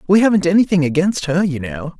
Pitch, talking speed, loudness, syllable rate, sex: 170 Hz, 210 wpm, -16 LUFS, 6.1 syllables/s, male